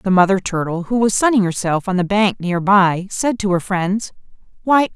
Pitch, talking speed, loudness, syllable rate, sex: 195 Hz, 205 wpm, -17 LUFS, 4.8 syllables/s, female